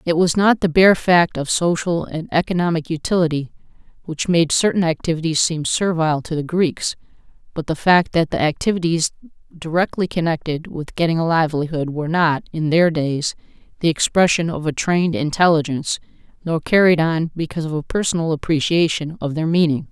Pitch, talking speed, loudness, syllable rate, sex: 165 Hz, 165 wpm, -18 LUFS, 5.5 syllables/s, female